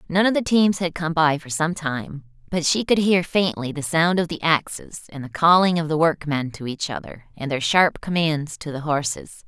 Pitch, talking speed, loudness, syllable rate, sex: 160 Hz, 230 wpm, -21 LUFS, 4.9 syllables/s, female